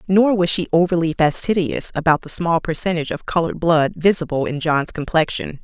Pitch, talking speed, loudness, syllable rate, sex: 165 Hz, 170 wpm, -19 LUFS, 5.6 syllables/s, female